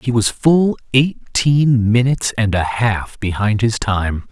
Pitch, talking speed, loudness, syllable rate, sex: 115 Hz, 155 wpm, -16 LUFS, 3.7 syllables/s, male